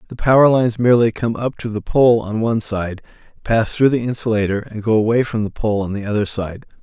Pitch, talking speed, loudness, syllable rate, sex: 110 Hz, 230 wpm, -17 LUFS, 6.0 syllables/s, male